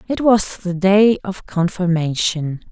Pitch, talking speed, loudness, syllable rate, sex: 185 Hz, 135 wpm, -17 LUFS, 3.6 syllables/s, female